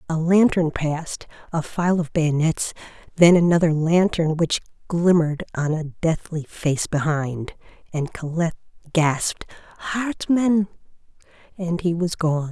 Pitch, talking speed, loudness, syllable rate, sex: 165 Hz, 120 wpm, -21 LUFS, 4.2 syllables/s, female